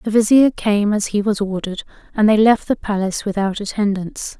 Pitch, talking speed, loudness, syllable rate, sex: 205 Hz, 190 wpm, -17 LUFS, 5.5 syllables/s, female